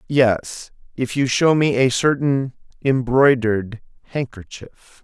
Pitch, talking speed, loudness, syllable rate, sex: 130 Hz, 105 wpm, -19 LUFS, 4.1 syllables/s, male